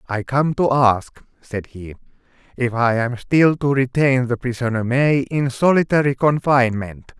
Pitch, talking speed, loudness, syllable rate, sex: 130 Hz, 150 wpm, -18 LUFS, 4.3 syllables/s, male